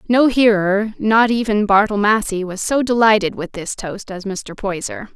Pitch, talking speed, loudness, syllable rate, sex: 210 Hz, 175 wpm, -17 LUFS, 4.5 syllables/s, female